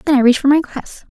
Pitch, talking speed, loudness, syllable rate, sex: 275 Hz, 310 wpm, -14 LUFS, 8.5 syllables/s, female